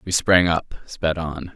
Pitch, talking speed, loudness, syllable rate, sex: 85 Hz, 195 wpm, -20 LUFS, 3.6 syllables/s, male